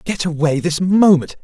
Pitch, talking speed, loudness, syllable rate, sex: 165 Hz, 165 wpm, -15 LUFS, 4.6 syllables/s, male